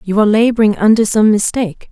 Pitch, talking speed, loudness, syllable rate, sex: 215 Hz, 190 wpm, -12 LUFS, 6.6 syllables/s, female